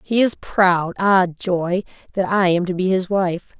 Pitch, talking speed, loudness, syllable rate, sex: 185 Hz, 165 wpm, -19 LUFS, 3.8 syllables/s, female